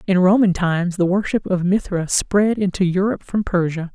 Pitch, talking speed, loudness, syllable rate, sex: 190 Hz, 185 wpm, -19 LUFS, 5.3 syllables/s, female